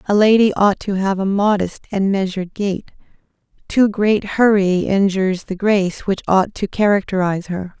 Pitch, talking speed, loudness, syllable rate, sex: 195 Hz, 160 wpm, -17 LUFS, 5.0 syllables/s, female